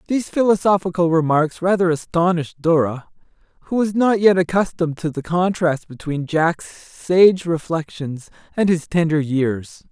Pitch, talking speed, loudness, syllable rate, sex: 170 Hz, 135 wpm, -19 LUFS, 4.7 syllables/s, male